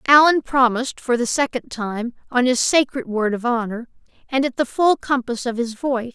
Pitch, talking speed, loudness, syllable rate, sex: 250 Hz, 195 wpm, -20 LUFS, 5.1 syllables/s, female